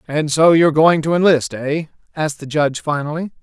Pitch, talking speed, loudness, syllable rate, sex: 155 Hz, 195 wpm, -16 LUFS, 5.9 syllables/s, male